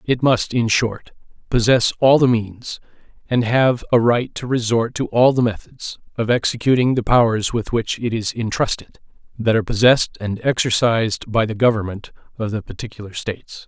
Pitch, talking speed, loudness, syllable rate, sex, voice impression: 115 Hz, 165 wpm, -18 LUFS, 5.2 syllables/s, male, masculine, adult-like, slightly fluent, sincere, slightly lively